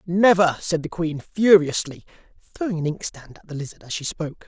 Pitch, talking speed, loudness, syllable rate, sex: 165 Hz, 190 wpm, -22 LUFS, 5.5 syllables/s, male